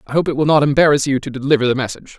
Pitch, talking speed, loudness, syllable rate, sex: 140 Hz, 300 wpm, -16 LUFS, 8.3 syllables/s, male